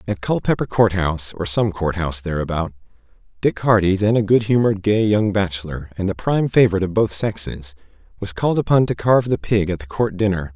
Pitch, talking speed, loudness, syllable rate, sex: 95 Hz, 205 wpm, -19 LUFS, 6.1 syllables/s, male